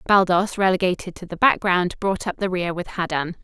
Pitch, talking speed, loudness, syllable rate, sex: 185 Hz, 190 wpm, -21 LUFS, 5.4 syllables/s, female